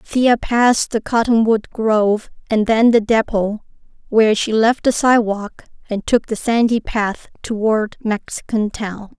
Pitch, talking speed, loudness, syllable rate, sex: 220 Hz, 145 wpm, -17 LUFS, 4.3 syllables/s, female